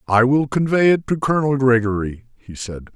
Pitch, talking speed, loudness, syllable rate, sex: 125 Hz, 185 wpm, -18 LUFS, 5.5 syllables/s, male